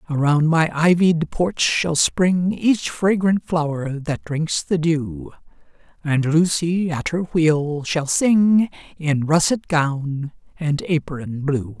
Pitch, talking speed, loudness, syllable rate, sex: 160 Hz, 130 wpm, -20 LUFS, 3.2 syllables/s, male